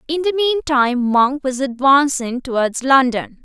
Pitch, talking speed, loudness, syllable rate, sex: 270 Hz, 155 wpm, -16 LUFS, 4.1 syllables/s, female